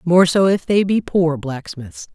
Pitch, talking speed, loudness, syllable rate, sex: 170 Hz, 195 wpm, -17 LUFS, 4.0 syllables/s, female